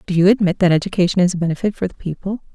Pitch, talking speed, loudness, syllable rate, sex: 185 Hz, 260 wpm, -18 LUFS, 7.7 syllables/s, female